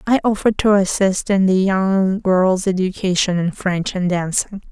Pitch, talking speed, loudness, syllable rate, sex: 190 Hz, 165 wpm, -17 LUFS, 4.5 syllables/s, female